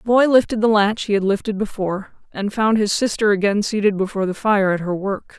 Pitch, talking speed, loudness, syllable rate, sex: 205 Hz, 235 wpm, -19 LUFS, 5.9 syllables/s, female